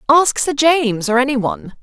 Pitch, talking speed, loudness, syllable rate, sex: 265 Hz, 165 wpm, -15 LUFS, 5.0 syllables/s, female